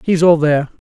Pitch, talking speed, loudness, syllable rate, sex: 160 Hz, 205 wpm, -14 LUFS, 6.3 syllables/s, male